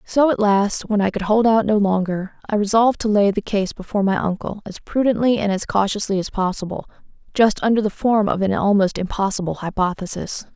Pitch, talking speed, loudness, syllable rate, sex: 205 Hz, 200 wpm, -19 LUFS, 5.6 syllables/s, female